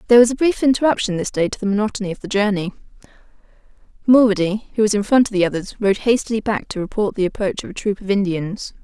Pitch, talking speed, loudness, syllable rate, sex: 205 Hz, 225 wpm, -19 LUFS, 7.0 syllables/s, female